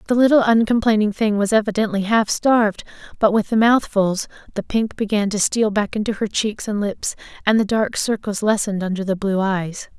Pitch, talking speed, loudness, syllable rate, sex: 210 Hz, 190 wpm, -19 LUFS, 5.3 syllables/s, female